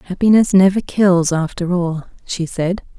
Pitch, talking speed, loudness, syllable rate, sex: 180 Hz, 140 wpm, -16 LUFS, 4.5 syllables/s, female